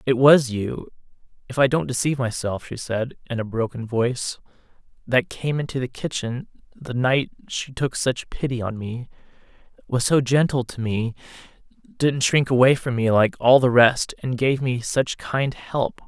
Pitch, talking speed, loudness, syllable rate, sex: 125 Hz, 175 wpm, -22 LUFS, 4.5 syllables/s, male